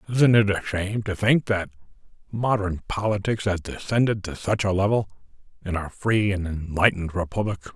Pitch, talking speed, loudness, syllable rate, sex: 100 Hz, 160 wpm, -24 LUFS, 5.3 syllables/s, male